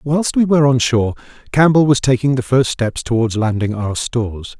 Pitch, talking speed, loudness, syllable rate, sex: 125 Hz, 195 wpm, -16 LUFS, 5.3 syllables/s, male